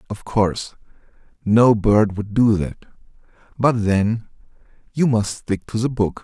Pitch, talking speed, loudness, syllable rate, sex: 110 Hz, 145 wpm, -19 LUFS, 4.0 syllables/s, male